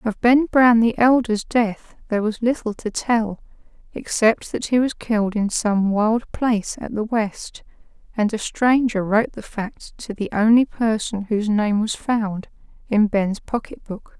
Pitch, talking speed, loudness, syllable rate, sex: 220 Hz, 175 wpm, -20 LUFS, 4.2 syllables/s, female